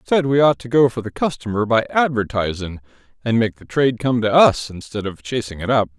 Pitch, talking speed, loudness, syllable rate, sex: 115 Hz, 220 wpm, -19 LUFS, 5.7 syllables/s, male